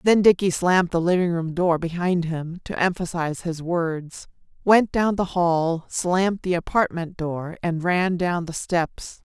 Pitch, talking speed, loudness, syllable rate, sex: 175 Hz, 165 wpm, -22 LUFS, 4.2 syllables/s, female